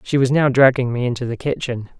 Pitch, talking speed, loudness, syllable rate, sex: 125 Hz, 240 wpm, -18 LUFS, 6.0 syllables/s, male